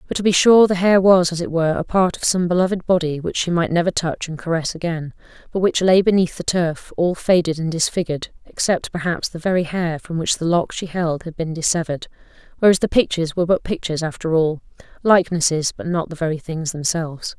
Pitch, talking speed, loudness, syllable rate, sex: 170 Hz, 215 wpm, -19 LUFS, 6.0 syllables/s, female